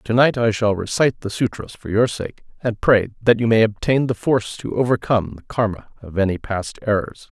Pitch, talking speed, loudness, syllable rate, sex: 110 Hz, 210 wpm, -20 LUFS, 5.4 syllables/s, male